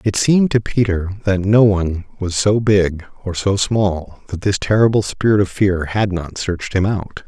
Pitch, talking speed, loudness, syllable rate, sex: 100 Hz, 200 wpm, -17 LUFS, 4.7 syllables/s, male